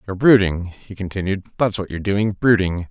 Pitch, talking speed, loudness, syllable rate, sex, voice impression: 100 Hz, 185 wpm, -19 LUFS, 5.7 syllables/s, male, very masculine, very adult-like, very middle-aged, very thick, tensed, very powerful, bright, slightly soft, slightly muffled, fluent, very cool, intellectual, sincere, very calm, very mature, friendly, reassuring, unique, wild, sweet, kind, slightly modest